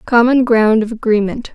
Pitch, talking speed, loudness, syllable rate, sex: 230 Hz, 155 wpm, -14 LUFS, 4.9 syllables/s, female